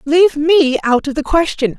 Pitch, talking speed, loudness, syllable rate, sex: 300 Hz, 200 wpm, -14 LUFS, 4.9 syllables/s, female